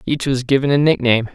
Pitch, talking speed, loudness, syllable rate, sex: 130 Hz, 220 wpm, -16 LUFS, 6.7 syllables/s, male